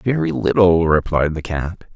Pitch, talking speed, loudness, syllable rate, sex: 85 Hz, 155 wpm, -17 LUFS, 4.4 syllables/s, male